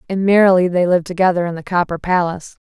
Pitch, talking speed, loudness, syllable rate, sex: 180 Hz, 200 wpm, -16 LUFS, 7.1 syllables/s, female